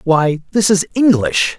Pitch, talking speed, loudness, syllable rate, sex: 180 Hz, 150 wpm, -14 LUFS, 3.9 syllables/s, male